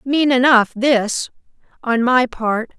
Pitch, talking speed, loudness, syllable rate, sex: 245 Hz, 130 wpm, -16 LUFS, 3.4 syllables/s, female